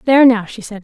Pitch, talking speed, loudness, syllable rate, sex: 225 Hz, 285 wpm, -12 LUFS, 6.8 syllables/s, female